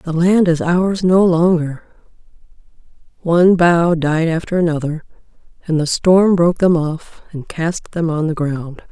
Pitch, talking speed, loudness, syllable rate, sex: 165 Hz, 155 wpm, -15 LUFS, 4.3 syllables/s, female